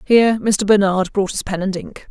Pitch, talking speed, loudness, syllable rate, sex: 200 Hz, 230 wpm, -17 LUFS, 5.1 syllables/s, female